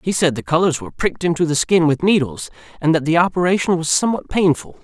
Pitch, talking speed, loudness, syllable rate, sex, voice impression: 165 Hz, 225 wpm, -17 LUFS, 6.6 syllables/s, male, masculine, adult-like, slightly fluent, slightly refreshing, unique